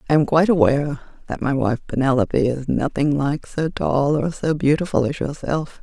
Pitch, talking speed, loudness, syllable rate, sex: 145 Hz, 185 wpm, -20 LUFS, 5.3 syllables/s, female